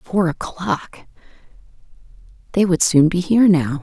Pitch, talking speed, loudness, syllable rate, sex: 170 Hz, 125 wpm, -17 LUFS, 4.3 syllables/s, female